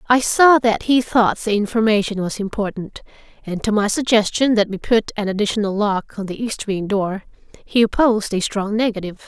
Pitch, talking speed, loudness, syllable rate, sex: 215 Hz, 190 wpm, -18 LUFS, 5.3 syllables/s, female